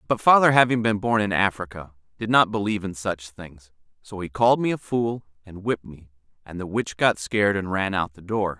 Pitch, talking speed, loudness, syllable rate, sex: 100 Hz, 225 wpm, -22 LUFS, 5.6 syllables/s, male